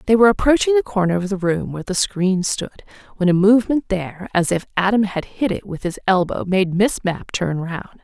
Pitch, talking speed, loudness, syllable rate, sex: 195 Hz, 225 wpm, -19 LUFS, 5.5 syllables/s, female